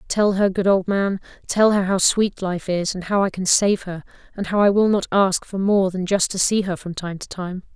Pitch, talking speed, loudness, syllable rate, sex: 190 Hz, 265 wpm, -20 LUFS, 5.0 syllables/s, female